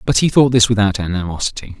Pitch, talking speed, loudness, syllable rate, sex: 105 Hz, 200 wpm, -15 LUFS, 6.5 syllables/s, male